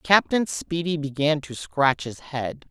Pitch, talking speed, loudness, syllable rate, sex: 150 Hz, 155 wpm, -24 LUFS, 3.8 syllables/s, female